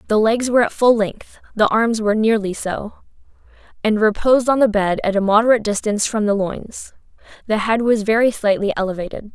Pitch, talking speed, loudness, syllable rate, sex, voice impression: 215 Hz, 185 wpm, -17 LUFS, 5.9 syllables/s, female, feminine, slightly young, tensed, powerful, slightly halting, intellectual, slightly friendly, elegant, lively, slightly sharp